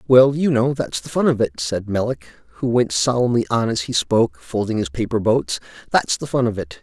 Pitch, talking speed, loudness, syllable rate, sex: 120 Hz, 230 wpm, -20 LUFS, 5.4 syllables/s, male